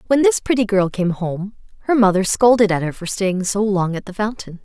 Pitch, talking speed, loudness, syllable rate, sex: 200 Hz, 235 wpm, -18 LUFS, 5.3 syllables/s, female